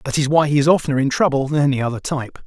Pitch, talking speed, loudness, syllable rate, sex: 140 Hz, 290 wpm, -18 LUFS, 7.7 syllables/s, male